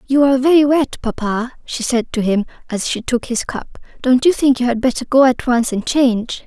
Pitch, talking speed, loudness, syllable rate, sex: 250 Hz, 230 wpm, -16 LUFS, 5.5 syllables/s, female